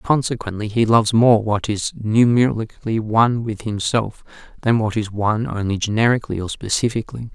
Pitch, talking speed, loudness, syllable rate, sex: 110 Hz, 145 wpm, -19 LUFS, 5.7 syllables/s, male